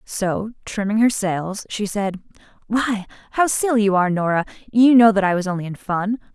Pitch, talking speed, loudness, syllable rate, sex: 205 Hz, 190 wpm, -19 LUFS, 5.1 syllables/s, female